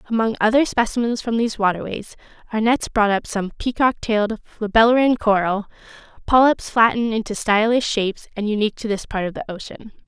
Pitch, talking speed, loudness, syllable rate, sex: 220 Hz, 165 wpm, -19 LUFS, 6.0 syllables/s, female